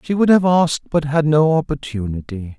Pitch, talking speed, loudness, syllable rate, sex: 150 Hz, 185 wpm, -17 LUFS, 5.4 syllables/s, male